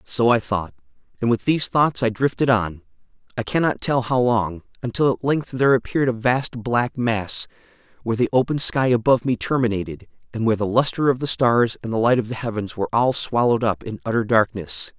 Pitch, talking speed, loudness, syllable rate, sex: 120 Hz, 205 wpm, -21 LUFS, 5.8 syllables/s, male